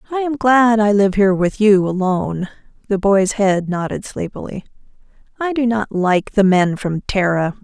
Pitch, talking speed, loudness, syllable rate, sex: 205 Hz, 175 wpm, -16 LUFS, 4.7 syllables/s, female